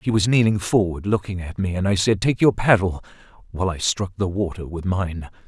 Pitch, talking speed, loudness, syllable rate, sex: 95 Hz, 220 wpm, -21 LUFS, 5.6 syllables/s, male